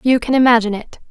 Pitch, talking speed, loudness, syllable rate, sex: 235 Hz, 215 wpm, -14 LUFS, 7.5 syllables/s, female